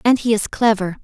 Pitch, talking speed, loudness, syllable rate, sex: 215 Hz, 230 wpm, -17 LUFS, 5.6 syllables/s, female